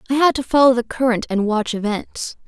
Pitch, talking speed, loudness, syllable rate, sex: 240 Hz, 220 wpm, -18 LUFS, 5.6 syllables/s, female